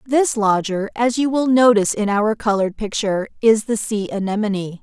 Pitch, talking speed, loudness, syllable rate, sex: 215 Hz, 175 wpm, -18 LUFS, 5.5 syllables/s, female